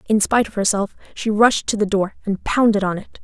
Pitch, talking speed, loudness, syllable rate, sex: 210 Hz, 240 wpm, -19 LUFS, 5.7 syllables/s, female